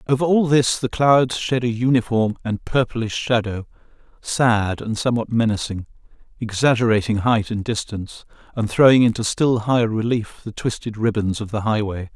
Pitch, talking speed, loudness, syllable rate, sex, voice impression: 115 Hz, 155 wpm, -20 LUFS, 5.0 syllables/s, male, masculine, adult-like, tensed, slightly weak, clear, fluent, cool, intellectual, calm, slightly friendly, wild, lively, slightly intense